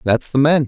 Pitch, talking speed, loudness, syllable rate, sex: 135 Hz, 265 wpm, -16 LUFS, 5.5 syllables/s, male